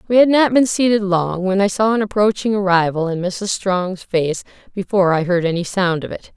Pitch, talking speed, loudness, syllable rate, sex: 195 Hz, 215 wpm, -17 LUFS, 5.3 syllables/s, female